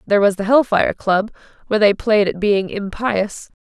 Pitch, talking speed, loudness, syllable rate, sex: 205 Hz, 200 wpm, -17 LUFS, 5.0 syllables/s, female